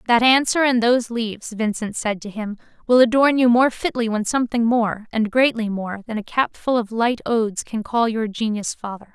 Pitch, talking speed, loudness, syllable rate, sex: 230 Hz, 205 wpm, -20 LUFS, 5.1 syllables/s, female